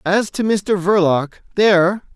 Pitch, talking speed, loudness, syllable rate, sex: 190 Hz, 110 wpm, -17 LUFS, 4.1 syllables/s, male